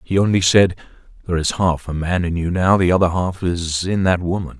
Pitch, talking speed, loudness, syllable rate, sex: 90 Hz, 220 wpm, -18 LUFS, 5.5 syllables/s, male